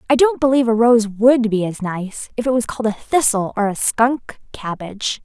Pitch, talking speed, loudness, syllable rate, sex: 230 Hz, 220 wpm, -18 LUFS, 5.2 syllables/s, female